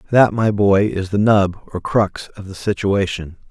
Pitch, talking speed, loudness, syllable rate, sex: 100 Hz, 190 wpm, -18 LUFS, 4.3 syllables/s, male